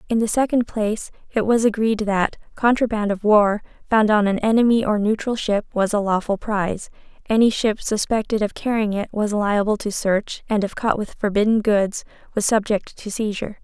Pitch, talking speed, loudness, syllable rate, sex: 210 Hz, 185 wpm, -20 LUFS, 5.2 syllables/s, female